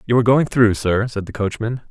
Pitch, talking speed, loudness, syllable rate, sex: 115 Hz, 250 wpm, -18 LUFS, 5.8 syllables/s, male